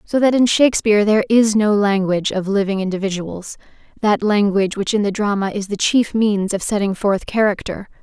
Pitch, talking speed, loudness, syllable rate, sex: 205 Hz, 180 wpm, -17 LUFS, 5.6 syllables/s, female